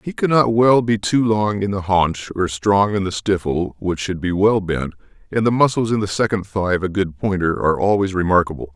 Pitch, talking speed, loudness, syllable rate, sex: 100 Hz, 225 wpm, -18 LUFS, 5.2 syllables/s, male